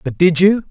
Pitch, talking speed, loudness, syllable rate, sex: 175 Hz, 255 wpm, -13 LUFS, 5.3 syllables/s, male